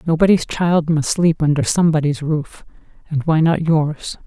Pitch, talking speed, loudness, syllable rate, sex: 155 Hz, 140 wpm, -17 LUFS, 4.7 syllables/s, female